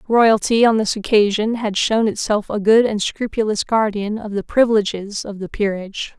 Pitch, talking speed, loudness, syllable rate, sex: 215 Hz, 175 wpm, -18 LUFS, 5.0 syllables/s, female